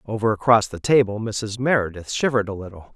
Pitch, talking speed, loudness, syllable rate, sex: 110 Hz, 180 wpm, -21 LUFS, 6.1 syllables/s, male